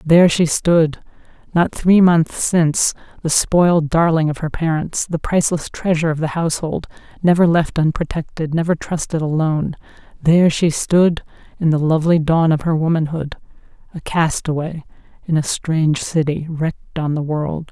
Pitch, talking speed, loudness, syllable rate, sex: 160 Hz, 145 wpm, -17 LUFS, 5.0 syllables/s, female